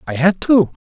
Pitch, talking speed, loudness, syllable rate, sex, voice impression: 175 Hz, 220 wpm, -15 LUFS, 5.1 syllables/s, male, very masculine, slightly old, thick, wild, slightly kind